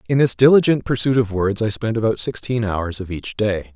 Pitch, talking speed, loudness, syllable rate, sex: 110 Hz, 225 wpm, -19 LUFS, 5.4 syllables/s, male